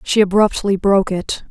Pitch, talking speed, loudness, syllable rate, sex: 195 Hz, 160 wpm, -16 LUFS, 5.1 syllables/s, female